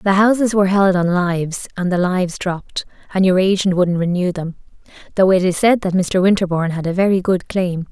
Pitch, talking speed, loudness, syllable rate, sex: 185 Hz, 210 wpm, -17 LUFS, 5.7 syllables/s, female